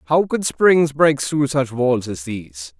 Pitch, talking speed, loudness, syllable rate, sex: 135 Hz, 195 wpm, -18 LUFS, 3.9 syllables/s, male